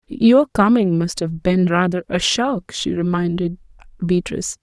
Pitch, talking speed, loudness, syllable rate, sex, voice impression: 190 Hz, 145 wpm, -18 LUFS, 4.2 syllables/s, female, feminine, adult-like, slightly muffled, calm, slightly strict